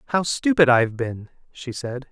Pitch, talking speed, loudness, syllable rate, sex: 135 Hz, 200 wpm, -21 LUFS, 4.9 syllables/s, male